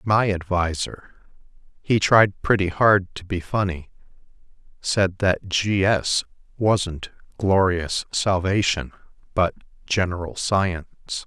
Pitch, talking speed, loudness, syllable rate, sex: 95 Hz, 90 wpm, -22 LUFS, 3.5 syllables/s, male